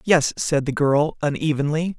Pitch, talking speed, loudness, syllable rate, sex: 150 Hz, 150 wpm, -21 LUFS, 4.4 syllables/s, male